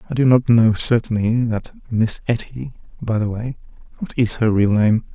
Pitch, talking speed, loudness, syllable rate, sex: 115 Hz, 175 wpm, -18 LUFS, 4.8 syllables/s, male